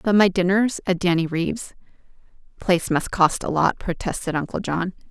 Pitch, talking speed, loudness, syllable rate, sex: 180 Hz, 165 wpm, -22 LUFS, 5.3 syllables/s, female